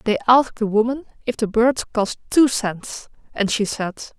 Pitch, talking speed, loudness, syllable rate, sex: 225 Hz, 185 wpm, -20 LUFS, 4.3 syllables/s, female